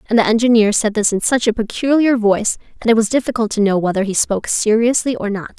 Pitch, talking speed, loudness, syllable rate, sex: 220 Hz, 235 wpm, -16 LUFS, 6.3 syllables/s, female